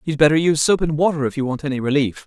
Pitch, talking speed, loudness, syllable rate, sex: 145 Hz, 290 wpm, -18 LUFS, 7.4 syllables/s, female